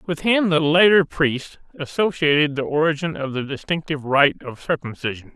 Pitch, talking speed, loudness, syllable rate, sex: 150 Hz, 155 wpm, -20 LUFS, 5.1 syllables/s, male